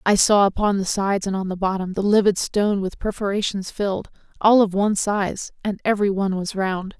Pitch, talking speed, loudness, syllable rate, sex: 200 Hz, 205 wpm, -21 LUFS, 5.8 syllables/s, female